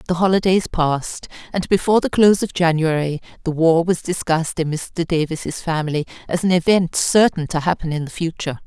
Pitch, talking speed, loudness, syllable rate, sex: 170 Hz, 180 wpm, -19 LUFS, 5.7 syllables/s, female